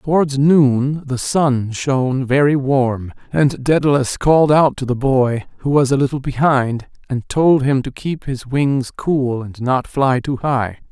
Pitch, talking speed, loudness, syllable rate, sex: 135 Hz, 175 wpm, -17 LUFS, 4.0 syllables/s, male